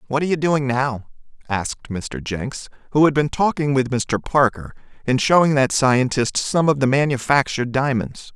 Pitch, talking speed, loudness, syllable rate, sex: 135 Hz, 170 wpm, -19 LUFS, 4.9 syllables/s, male